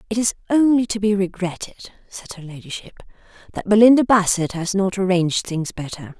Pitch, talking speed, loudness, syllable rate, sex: 195 Hz, 165 wpm, -18 LUFS, 5.7 syllables/s, female